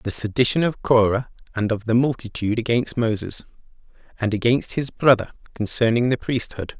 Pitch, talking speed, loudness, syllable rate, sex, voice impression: 115 Hz, 150 wpm, -21 LUFS, 5.3 syllables/s, male, very masculine, adult-like, slightly middle-aged, thick, slightly tensed, slightly weak, slightly dark, slightly soft, slightly muffled, slightly raspy, slightly cool, intellectual, slightly refreshing, slightly sincere, calm, mature, slightly friendly, slightly reassuring, unique, elegant, sweet, strict, slightly modest